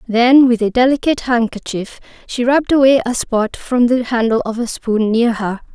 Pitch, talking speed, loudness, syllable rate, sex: 240 Hz, 190 wpm, -15 LUFS, 5.0 syllables/s, female